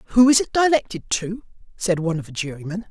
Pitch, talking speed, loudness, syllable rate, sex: 200 Hz, 205 wpm, -20 LUFS, 5.9 syllables/s, male